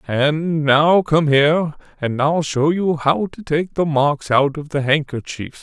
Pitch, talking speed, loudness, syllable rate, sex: 150 Hz, 180 wpm, -18 LUFS, 3.9 syllables/s, male